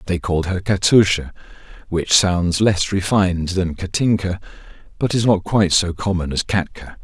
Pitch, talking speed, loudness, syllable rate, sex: 95 Hz, 155 wpm, -18 LUFS, 5.0 syllables/s, male